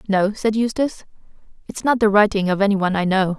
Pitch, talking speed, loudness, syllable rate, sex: 205 Hz, 195 wpm, -19 LUFS, 6.1 syllables/s, female